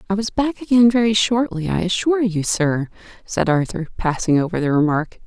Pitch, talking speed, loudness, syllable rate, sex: 195 Hz, 180 wpm, -19 LUFS, 5.4 syllables/s, female